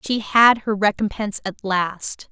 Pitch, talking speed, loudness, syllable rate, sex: 210 Hz, 155 wpm, -19 LUFS, 4.2 syllables/s, female